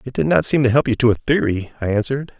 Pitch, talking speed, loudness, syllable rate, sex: 120 Hz, 300 wpm, -18 LUFS, 6.9 syllables/s, male